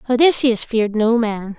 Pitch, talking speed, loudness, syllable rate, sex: 230 Hz, 150 wpm, -17 LUFS, 5.0 syllables/s, female